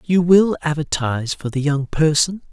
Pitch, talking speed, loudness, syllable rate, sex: 155 Hz, 165 wpm, -18 LUFS, 4.8 syllables/s, male